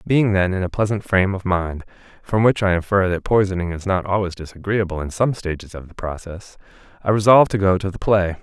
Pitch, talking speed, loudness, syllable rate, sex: 95 Hz, 220 wpm, -19 LUFS, 3.0 syllables/s, male